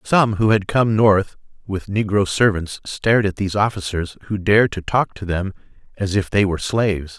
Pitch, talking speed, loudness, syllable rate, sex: 100 Hz, 190 wpm, -19 LUFS, 5.2 syllables/s, male